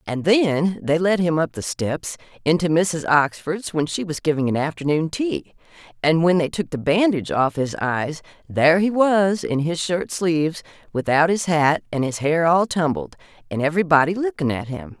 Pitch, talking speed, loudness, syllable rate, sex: 165 Hz, 190 wpm, -20 LUFS, 4.8 syllables/s, female